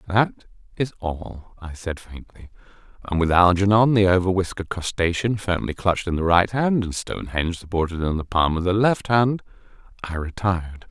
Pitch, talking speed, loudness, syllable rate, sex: 95 Hz, 165 wpm, -22 LUFS, 5.2 syllables/s, male